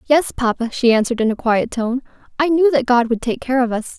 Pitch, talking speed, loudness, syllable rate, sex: 250 Hz, 255 wpm, -17 LUFS, 5.7 syllables/s, female